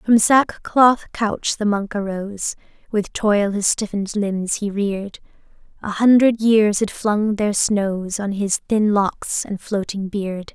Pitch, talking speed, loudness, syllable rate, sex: 205 Hz, 155 wpm, -19 LUFS, 3.5 syllables/s, female